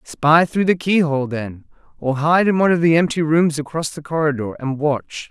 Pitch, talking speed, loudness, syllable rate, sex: 160 Hz, 205 wpm, -18 LUFS, 5.2 syllables/s, female